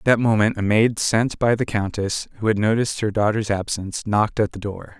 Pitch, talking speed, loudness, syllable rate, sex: 105 Hz, 230 wpm, -21 LUFS, 5.7 syllables/s, male